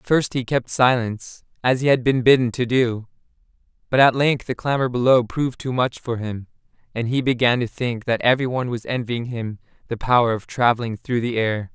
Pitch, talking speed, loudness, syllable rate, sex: 120 Hz, 205 wpm, -20 LUFS, 5.4 syllables/s, male